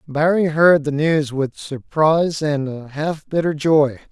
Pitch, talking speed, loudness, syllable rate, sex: 150 Hz, 160 wpm, -18 LUFS, 3.9 syllables/s, male